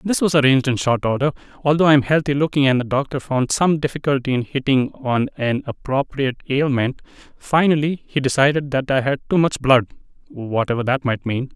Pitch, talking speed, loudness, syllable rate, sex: 135 Hz, 180 wpm, -19 LUFS, 5.7 syllables/s, male